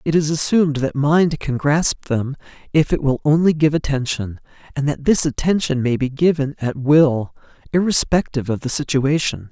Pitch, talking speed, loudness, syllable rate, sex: 145 Hz, 170 wpm, -18 LUFS, 5.0 syllables/s, male